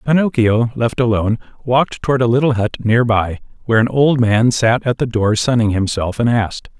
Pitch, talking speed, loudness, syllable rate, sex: 120 Hz, 195 wpm, -16 LUFS, 5.5 syllables/s, male